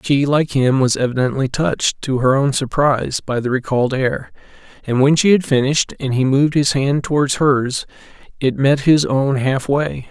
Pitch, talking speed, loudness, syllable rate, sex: 135 Hz, 170 wpm, -17 LUFS, 4.9 syllables/s, male